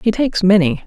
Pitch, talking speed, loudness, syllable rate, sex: 200 Hz, 205 wpm, -14 LUFS, 6.1 syllables/s, female